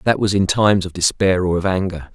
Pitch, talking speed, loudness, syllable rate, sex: 95 Hz, 250 wpm, -17 LUFS, 5.9 syllables/s, male